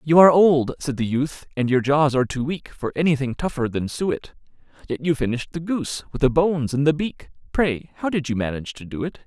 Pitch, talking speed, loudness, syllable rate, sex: 140 Hz, 235 wpm, -22 LUFS, 6.0 syllables/s, male